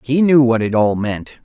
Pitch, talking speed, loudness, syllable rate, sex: 125 Hz, 250 wpm, -15 LUFS, 4.9 syllables/s, male